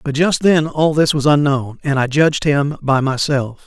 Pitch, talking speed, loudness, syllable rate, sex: 145 Hz, 215 wpm, -16 LUFS, 4.6 syllables/s, male